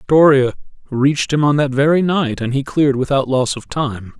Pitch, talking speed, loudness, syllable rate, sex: 135 Hz, 200 wpm, -16 LUFS, 5.3 syllables/s, male